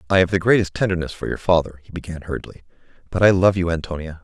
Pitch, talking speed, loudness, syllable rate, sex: 90 Hz, 225 wpm, -20 LUFS, 7.1 syllables/s, male